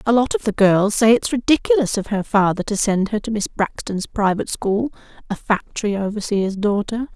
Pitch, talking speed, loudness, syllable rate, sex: 210 Hz, 195 wpm, -19 LUFS, 5.5 syllables/s, female